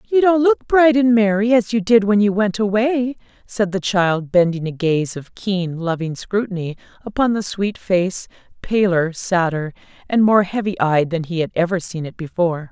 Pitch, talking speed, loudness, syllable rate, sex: 195 Hz, 190 wpm, -18 LUFS, 4.7 syllables/s, female